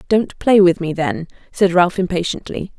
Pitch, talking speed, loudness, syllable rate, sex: 185 Hz, 170 wpm, -16 LUFS, 4.7 syllables/s, female